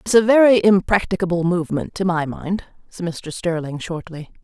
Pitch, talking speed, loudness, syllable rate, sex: 180 Hz, 160 wpm, -19 LUFS, 5.3 syllables/s, female